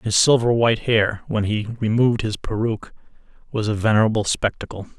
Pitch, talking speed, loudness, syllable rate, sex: 110 Hz, 155 wpm, -20 LUFS, 5.8 syllables/s, male